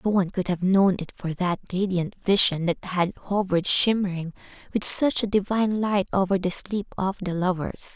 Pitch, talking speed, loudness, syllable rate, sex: 190 Hz, 190 wpm, -24 LUFS, 5.2 syllables/s, female